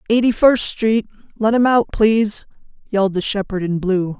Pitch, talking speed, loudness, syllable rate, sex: 210 Hz, 155 wpm, -17 LUFS, 4.9 syllables/s, female